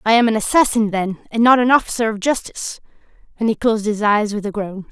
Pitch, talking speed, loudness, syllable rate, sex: 220 Hz, 230 wpm, -17 LUFS, 6.3 syllables/s, female